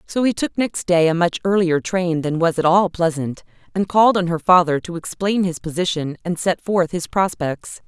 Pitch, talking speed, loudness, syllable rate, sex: 175 Hz, 215 wpm, -19 LUFS, 4.9 syllables/s, female